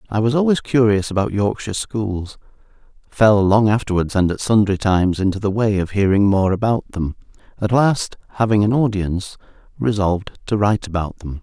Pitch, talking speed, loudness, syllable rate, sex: 105 Hz, 160 wpm, -18 LUFS, 5.4 syllables/s, male